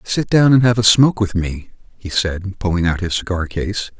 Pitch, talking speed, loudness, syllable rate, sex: 100 Hz, 225 wpm, -16 LUFS, 5.1 syllables/s, male